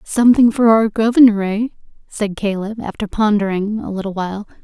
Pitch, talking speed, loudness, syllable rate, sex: 210 Hz, 155 wpm, -16 LUFS, 5.5 syllables/s, female